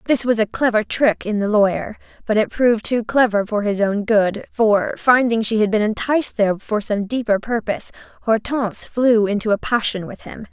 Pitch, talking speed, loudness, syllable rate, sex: 220 Hz, 200 wpm, -18 LUFS, 5.2 syllables/s, female